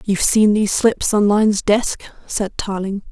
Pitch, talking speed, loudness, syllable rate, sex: 205 Hz, 175 wpm, -17 LUFS, 4.9 syllables/s, female